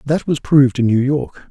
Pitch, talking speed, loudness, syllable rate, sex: 130 Hz, 240 wpm, -15 LUFS, 5.3 syllables/s, male